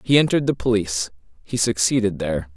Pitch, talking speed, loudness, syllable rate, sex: 105 Hz, 165 wpm, -21 LUFS, 6.6 syllables/s, male